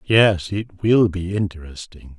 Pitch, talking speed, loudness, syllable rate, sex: 95 Hz, 135 wpm, -19 LUFS, 3.8 syllables/s, male